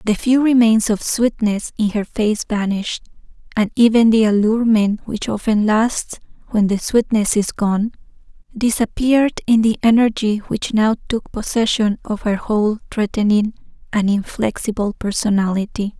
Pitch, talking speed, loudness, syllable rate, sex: 215 Hz, 135 wpm, -17 LUFS, 4.6 syllables/s, female